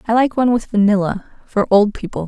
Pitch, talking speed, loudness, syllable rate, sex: 215 Hz, 210 wpm, -16 LUFS, 6.4 syllables/s, female